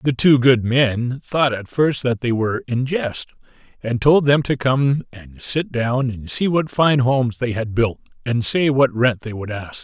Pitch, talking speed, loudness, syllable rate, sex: 125 Hz, 215 wpm, -19 LUFS, 4.2 syllables/s, male